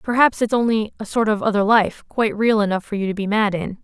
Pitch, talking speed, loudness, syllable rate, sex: 215 Hz, 250 wpm, -19 LUFS, 6.1 syllables/s, female